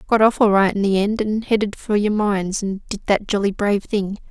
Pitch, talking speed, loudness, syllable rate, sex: 205 Hz, 250 wpm, -19 LUFS, 5.4 syllables/s, female